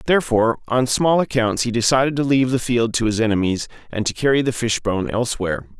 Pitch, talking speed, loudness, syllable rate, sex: 120 Hz, 195 wpm, -19 LUFS, 6.5 syllables/s, male